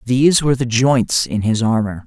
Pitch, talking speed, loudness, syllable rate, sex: 120 Hz, 205 wpm, -16 LUFS, 5.1 syllables/s, male